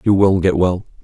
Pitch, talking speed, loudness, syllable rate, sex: 95 Hz, 230 wpm, -15 LUFS, 5.1 syllables/s, male